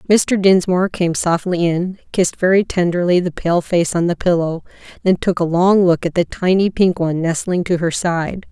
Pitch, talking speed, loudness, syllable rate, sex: 175 Hz, 195 wpm, -16 LUFS, 5.0 syllables/s, female